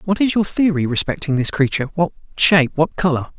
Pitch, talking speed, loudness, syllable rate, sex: 160 Hz, 175 wpm, -18 LUFS, 6.4 syllables/s, male